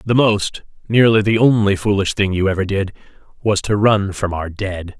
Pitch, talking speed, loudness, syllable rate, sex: 100 Hz, 180 wpm, -17 LUFS, 4.9 syllables/s, male